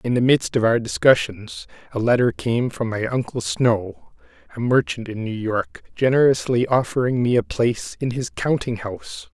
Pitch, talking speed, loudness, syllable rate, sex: 120 Hz, 175 wpm, -21 LUFS, 4.7 syllables/s, male